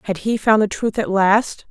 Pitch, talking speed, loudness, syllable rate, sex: 210 Hz, 245 wpm, -18 LUFS, 4.6 syllables/s, female